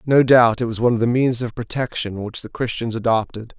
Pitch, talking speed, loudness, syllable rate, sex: 120 Hz, 235 wpm, -19 LUFS, 5.8 syllables/s, male